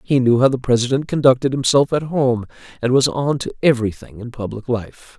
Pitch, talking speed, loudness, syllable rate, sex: 125 Hz, 195 wpm, -18 LUFS, 5.6 syllables/s, male